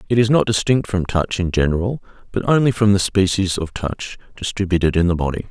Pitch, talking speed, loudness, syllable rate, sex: 95 Hz, 205 wpm, -18 LUFS, 5.8 syllables/s, male